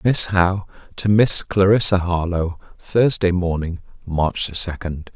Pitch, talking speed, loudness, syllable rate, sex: 90 Hz, 115 wpm, -19 LUFS, 4.2 syllables/s, male